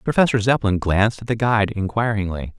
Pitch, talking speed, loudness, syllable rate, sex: 105 Hz, 160 wpm, -20 LUFS, 6.1 syllables/s, male